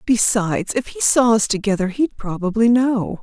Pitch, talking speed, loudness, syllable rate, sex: 220 Hz, 170 wpm, -18 LUFS, 4.9 syllables/s, female